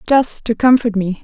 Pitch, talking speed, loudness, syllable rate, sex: 225 Hz, 195 wpm, -15 LUFS, 4.6 syllables/s, female